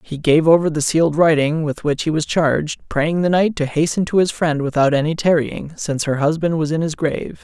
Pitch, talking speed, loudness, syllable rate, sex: 155 Hz, 235 wpm, -18 LUFS, 5.5 syllables/s, male